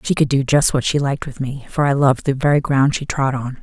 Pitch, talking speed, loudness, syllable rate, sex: 135 Hz, 300 wpm, -18 LUFS, 6.0 syllables/s, female